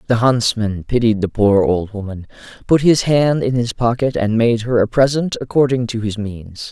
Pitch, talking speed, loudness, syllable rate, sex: 115 Hz, 195 wpm, -16 LUFS, 4.8 syllables/s, male